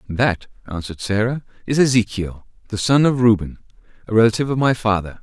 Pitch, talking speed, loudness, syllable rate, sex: 110 Hz, 160 wpm, -19 LUFS, 6.1 syllables/s, male